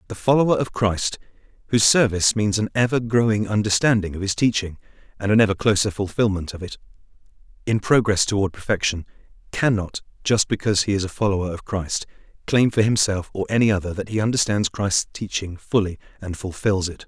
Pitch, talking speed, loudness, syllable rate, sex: 105 Hz, 170 wpm, -21 LUFS, 5.9 syllables/s, male